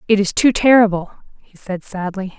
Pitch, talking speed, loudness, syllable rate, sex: 200 Hz, 175 wpm, -16 LUFS, 5.1 syllables/s, female